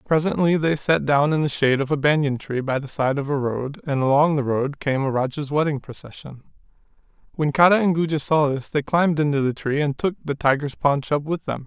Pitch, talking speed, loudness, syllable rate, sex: 145 Hz, 230 wpm, -21 LUFS, 5.6 syllables/s, male